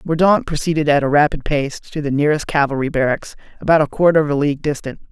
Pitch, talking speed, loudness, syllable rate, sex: 145 Hz, 210 wpm, -17 LUFS, 6.5 syllables/s, male